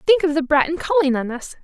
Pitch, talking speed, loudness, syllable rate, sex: 310 Hz, 255 wpm, -19 LUFS, 6.2 syllables/s, female